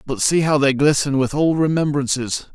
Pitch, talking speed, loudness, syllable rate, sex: 145 Hz, 190 wpm, -18 LUFS, 5.0 syllables/s, male